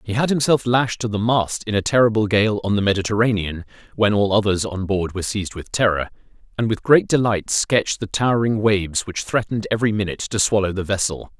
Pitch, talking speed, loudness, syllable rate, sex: 105 Hz, 205 wpm, -20 LUFS, 6.1 syllables/s, male